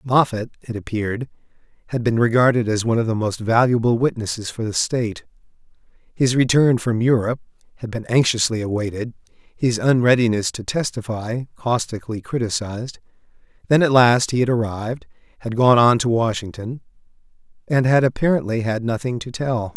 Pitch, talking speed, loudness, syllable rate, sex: 115 Hz, 145 wpm, -20 LUFS, 5.5 syllables/s, male